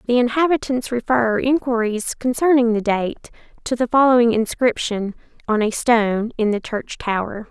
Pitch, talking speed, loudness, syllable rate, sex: 235 Hz, 145 wpm, -19 LUFS, 4.8 syllables/s, female